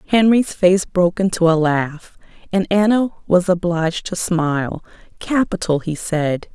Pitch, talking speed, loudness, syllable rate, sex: 180 Hz, 135 wpm, -18 LUFS, 4.4 syllables/s, female